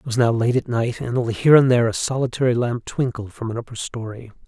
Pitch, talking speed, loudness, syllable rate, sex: 120 Hz, 255 wpm, -20 LUFS, 6.5 syllables/s, male